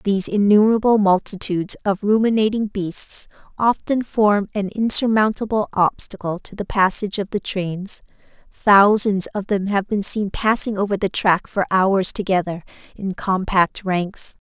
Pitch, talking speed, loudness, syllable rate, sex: 200 Hz, 135 wpm, -19 LUFS, 4.6 syllables/s, female